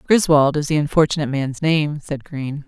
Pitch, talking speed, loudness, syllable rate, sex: 150 Hz, 180 wpm, -19 LUFS, 5.3 syllables/s, female